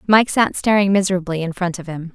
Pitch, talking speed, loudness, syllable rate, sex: 185 Hz, 225 wpm, -18 LUFS, 6.1 syllables/s, female